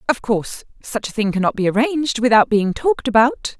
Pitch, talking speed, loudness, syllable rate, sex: 235 Hz, 200 wpm, -18 LUFS, 5.9 syllables/s, female